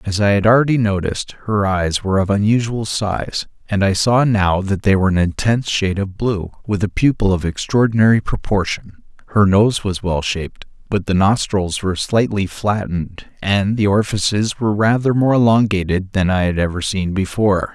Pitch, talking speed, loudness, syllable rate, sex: 100 Hz, 180 wpm, -17 LUFS, 5.3 syllables/s, male